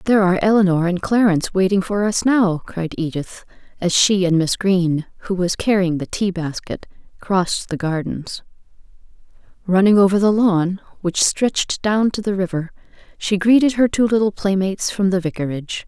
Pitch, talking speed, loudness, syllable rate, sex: 190 Hz, 165 wpm, -18 LUFS, 5.2 syllables/s, female